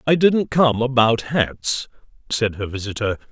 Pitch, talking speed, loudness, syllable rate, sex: 125 Hz, 145 wpm, -20 LUFS, 4.1 syllables/s, male